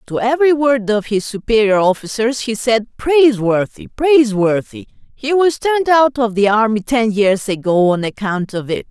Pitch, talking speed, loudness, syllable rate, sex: 230 Hz, 170 wpm, -15 LUFS, 4.9 syllables/s, female